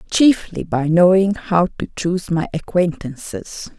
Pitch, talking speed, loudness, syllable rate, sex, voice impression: 175 Hz, 125 wpm, -18 LUFS, 4.1 syllables/s, female, very feminine, slightly old, very thin, slightly tensed, weak, slightly bright, soft, clear, slightly halting, slightly raspy, slightly cool, intellectual, refreshing, very sincere, very calm, friendly, slightly reassuring, unique, very elegant, slightly wild, sweet, slightly lively, kind, modest